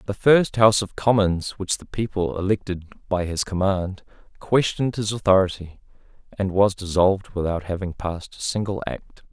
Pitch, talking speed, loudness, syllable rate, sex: 95 Hz, 155 wpm, -22 LUFS, 5.1 syllables/s, male